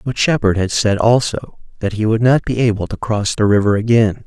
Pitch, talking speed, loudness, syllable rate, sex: 110 Hz, 225 wpm, -16 LUFS, 5.3 syllables/s, male